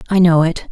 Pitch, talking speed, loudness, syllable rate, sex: 170 Hz, 255 wpm, -13 LUFS, 6.1 syllables/s, female